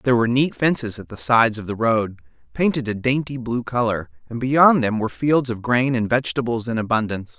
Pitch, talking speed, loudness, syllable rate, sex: 120 Hz, 210 wpm, -20 LUFS, 5.8 syllables/s, male